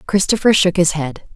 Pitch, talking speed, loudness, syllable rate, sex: 180 Hz, 175 wpm, -15 LUFS, 5.2 syllables/s, female